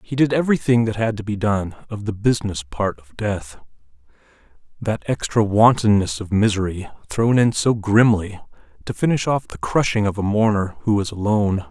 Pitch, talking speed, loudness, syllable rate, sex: 105 Hz, 170 wpm, -20 LUFS, 5.2 syllables/s, male